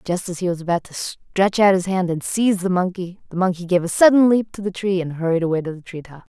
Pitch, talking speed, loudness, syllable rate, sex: 185 Hz, 285 wpm, -19 LUFS, 6.1 syllables/s, female